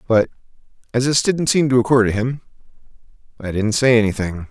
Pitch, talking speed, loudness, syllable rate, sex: 120 Hz, 175 wpm, -18 LUFS, 5.8 syllables/s, male